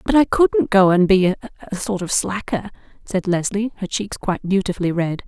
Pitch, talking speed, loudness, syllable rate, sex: 195 Hz, 195 wpm, -19 LUFS, 5.4 syllables/s, female